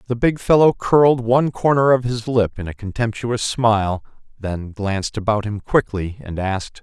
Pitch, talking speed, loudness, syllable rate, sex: 115 Hz, 175 wpm, -19 LUFS, 4.9 syllables/s, male